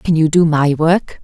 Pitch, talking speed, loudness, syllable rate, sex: 160 Hz, 245 wpm, -14 LUFS, 4.2 syllables/s, female